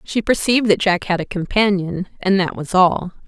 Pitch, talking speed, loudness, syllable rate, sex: 190 Hz, 200 wpm, -18 LUFS, 5.2 syllables/s, female